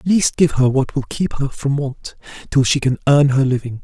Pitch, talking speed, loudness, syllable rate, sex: 140 Hz, 265 wpm, -17 LUFS, 5.3 syllables/s, male